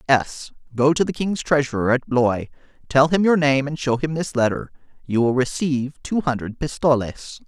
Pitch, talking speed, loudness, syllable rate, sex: 140 Hz, 175 wpm, -21 LUFS, 5.0 syllables/s, male